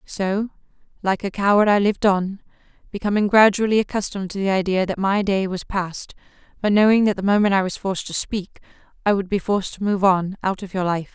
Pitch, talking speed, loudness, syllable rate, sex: 195 Hz, 210 wpm, -20 LUFS, 5.8 syllables/s, female